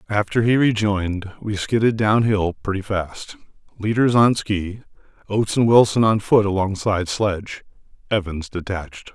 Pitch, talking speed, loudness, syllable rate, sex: 105 Hz, 125 wpm, -20 LUFS, 4.8 syllables/s, male